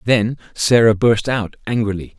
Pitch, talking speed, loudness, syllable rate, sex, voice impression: 110 Hz, 135 wpm, -17 LUFS, 4.5 syllables/s, male, masculine, adult-like, slightly thick, slightly fluent, slightly refreshing, sincere, friendly